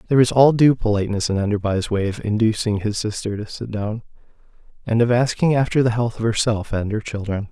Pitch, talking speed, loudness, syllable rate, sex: 110 Hz, 210 wpm, -20 LUFS, 6.1 syllables/s, male